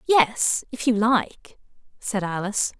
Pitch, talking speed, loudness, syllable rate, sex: 220 Hz, 130 wpm, -22 LUFS, 3.8 syllables/s, female